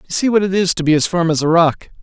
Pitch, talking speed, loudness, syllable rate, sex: 170 Hz, 355 wpm, -15 LUFS, 6.9 syllables/s, male